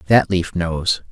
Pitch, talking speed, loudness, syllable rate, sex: 90 Hz, 160 wpm, -19 LUFS, 3.5 syllables/s, male